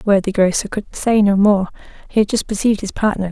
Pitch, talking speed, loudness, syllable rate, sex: 205 Hz, 235 wpm, -17 LUFS, 6.3 syllables/s, female